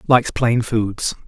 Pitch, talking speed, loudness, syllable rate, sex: 115 Hz, 140 wpm, -19 LUFS, 3.9 syllables/s, male